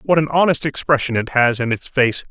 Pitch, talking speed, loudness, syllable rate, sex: 135 Hz, 235 wpm, -17 LUFS, 5.6 syllables/s, male